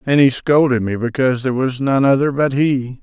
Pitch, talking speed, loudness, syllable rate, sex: 130 Hz, 220 wpm, -16 LUFS, 5.5 syllables/s, male